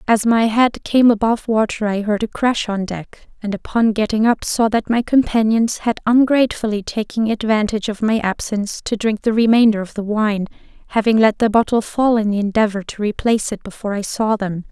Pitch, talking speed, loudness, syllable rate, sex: 220 Hz, 200 wpm, -17 LUFS, 5.5 syllables/s, female